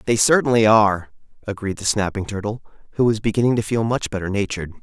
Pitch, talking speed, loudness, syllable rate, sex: 110 Hz, 185 wpm, -19 LUFS, 6.7 syllables/s, male